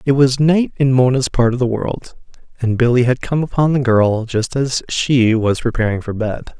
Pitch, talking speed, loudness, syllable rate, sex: 125 Hz, 210 wpm, -16 LUFS, 4.8 syllables/s, male